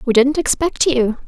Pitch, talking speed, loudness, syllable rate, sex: 265 Hz, 190 wpm, -16 LUFS, 4.5 syllables/s, female